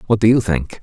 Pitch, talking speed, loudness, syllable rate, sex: 100 Hz, 290 wpm, -16 LUFS, 6.0 syllables/s, male